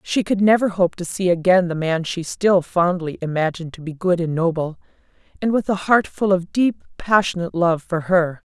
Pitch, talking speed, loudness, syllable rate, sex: 180 Hz, 205 wpm, -19 LUFS, 5.2 syllables/s, female